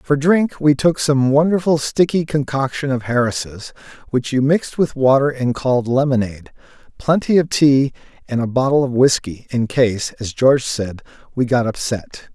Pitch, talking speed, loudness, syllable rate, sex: 135 Hz, 165 wpm, -17 LUFS, 4.9 syllables/s, male